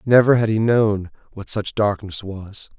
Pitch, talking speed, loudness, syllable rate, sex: 105 Hz, 170 wpm, -19 LUFS, 4.2 syllables/s, male